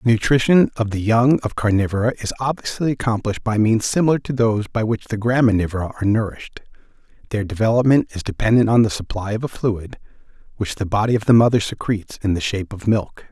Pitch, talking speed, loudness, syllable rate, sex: 110 Hz, 195 wpm, -19 LUFS, 6.4 syllables/s, male